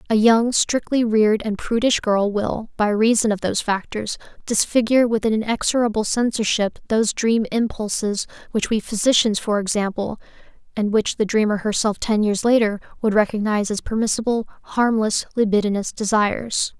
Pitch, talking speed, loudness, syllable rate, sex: 215 Hz, 145 wpm, -20 LUFS, 5.3 syllables/s, female